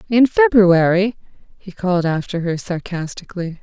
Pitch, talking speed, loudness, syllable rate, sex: 190 Hz, 115 wpm, -17 LUFS, 4.9 syllables/s, female